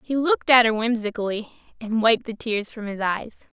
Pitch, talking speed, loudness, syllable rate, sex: 225 Hz, 200 wpm, -22 LUFS, 5.1 syllables/s, female